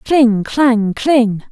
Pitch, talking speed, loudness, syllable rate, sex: 240 Hz, 120 wpm, -13 LUFS, 2.1 syllables/s, female